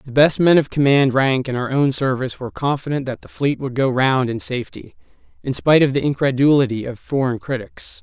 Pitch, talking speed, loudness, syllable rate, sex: 135 Hz, 210 wpm, -18 LUFS, 5.7 syllables/s, male